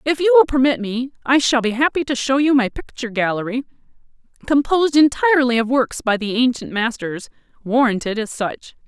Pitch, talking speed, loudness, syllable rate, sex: 255 Hz, 170 wpm, -18 LUFS, 5.6 syllables/s, female